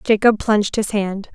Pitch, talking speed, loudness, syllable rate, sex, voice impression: 210 Hz, 180 wpm, -18 LUFS, 4.9 syllables/s, female, feminine, adult-like, tensed, powerful, bright, clear, fluent, intellectual, friendly, lively, intense